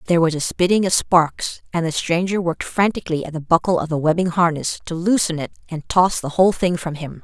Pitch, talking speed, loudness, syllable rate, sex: 170 Hz, 230 wpm, -19 LUFS, 5.9 syllables/s, female